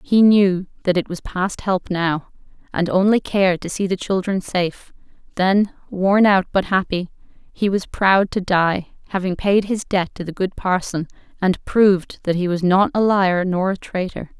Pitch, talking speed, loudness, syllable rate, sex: 185 Hz, 190 wpm, -19 LUFS, 4.5 syllables/s, female